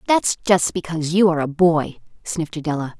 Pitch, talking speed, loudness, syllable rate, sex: 170 Hz, 180 wpm, -19 LUFS, 5.8 syllables/s, female